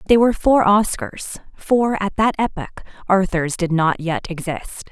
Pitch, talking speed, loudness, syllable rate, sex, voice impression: 190 Hz, 160 wpm, -19 LUFS, 4.4 syllables/s, female, feminine, adult-like, tensed, powerful, bright, slightly soft, clear, fluent, slightly intellectual, calm, friendly, elegant, lively